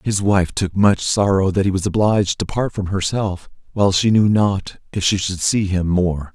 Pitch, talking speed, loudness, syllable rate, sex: 95 Hz, 215 wpm, -18 LUFS, 4.8 syllables/s, male